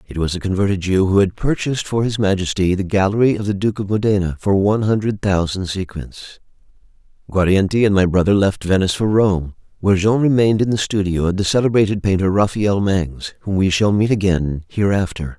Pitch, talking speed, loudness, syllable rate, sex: 100 Hz, 190 wpm, -17 LUFS, 5.9 syllables/s, male